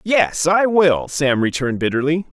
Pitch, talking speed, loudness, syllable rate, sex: 155 Hz, 150 wpm, -17 LUFS, 4.6 syllables/s, male